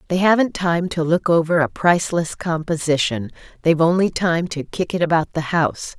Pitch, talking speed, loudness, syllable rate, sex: 165 Hz, 180 wpm, -19 LUFS, 5.3 syllables/s, female